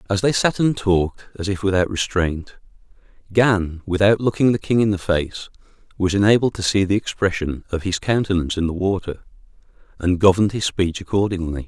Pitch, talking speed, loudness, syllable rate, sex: 95 Hz, 175 wpm, -20 LUFS, 5.6 syllables/s, male